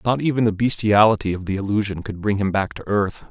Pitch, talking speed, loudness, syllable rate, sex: 105 Hz, 235 wpm, -20 LUFS, 6.1 syllables/s, male